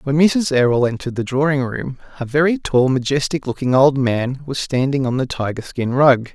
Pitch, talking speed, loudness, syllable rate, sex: 135 Hz, 200 wpm, -18 LUFS, 5.2 syllables/s, male